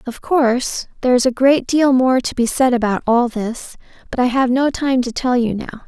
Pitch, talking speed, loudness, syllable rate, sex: 250 Hz, 235 wpm, -17 LUFS, 5.2 syllables/s, female